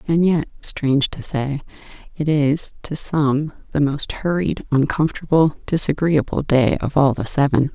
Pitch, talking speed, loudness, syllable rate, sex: 145 Hz, 145 wpm, -19 LUFS, 4.4 syllables/s, female